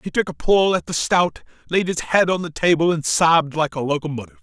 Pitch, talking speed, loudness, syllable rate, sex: 160 Hz, 245 wpm, -19 LUFS, 5.9 syllables/s, male